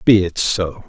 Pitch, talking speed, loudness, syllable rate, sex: 95 Hz, 205 wpm, -17 LUFS, 3.9 syllables/s, male